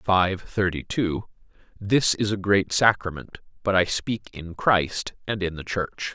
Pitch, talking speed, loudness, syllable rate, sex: 95 Hz, 165 wpm, -24 LUFS, 3.9 syllables/s, male